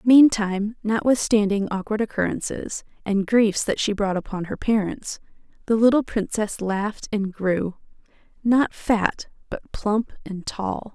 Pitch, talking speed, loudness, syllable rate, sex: 210 Hz, 125 wpm, -23 LUFS, 4.2 syllables/s, female